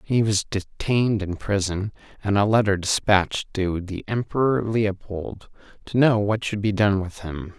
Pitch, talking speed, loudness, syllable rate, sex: 100 Hz, 165 wpm, -23 LUFS, 4.4 syllables/s, male